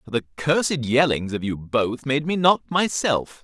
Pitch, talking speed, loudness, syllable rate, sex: 135 Hz, 190 wpm, -22 LUFS, 4.5 syllables/s, male